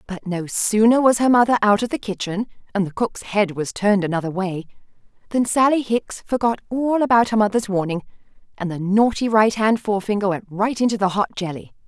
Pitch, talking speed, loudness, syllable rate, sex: 210 Hz, 190 wpm, -20 LUFS, 5.6 syllables/s, female